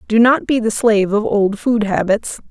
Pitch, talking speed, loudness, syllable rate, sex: 215 Hz, 215 wpm, -15 LUFS, 4.8 syllables/s, female